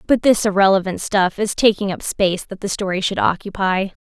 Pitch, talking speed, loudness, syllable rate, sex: 195 Hz, 195 wpm, -18 LUFS, 5.5 syllables/s, female